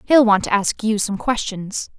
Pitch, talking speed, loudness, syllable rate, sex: 215 Hz, 210 wpm, -19 LUFS, 4.4 syllables/s, female